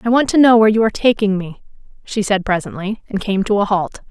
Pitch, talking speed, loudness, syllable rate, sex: 210 Hz, 250 wpm, -16 LUFS, 6.3 syllables/s, female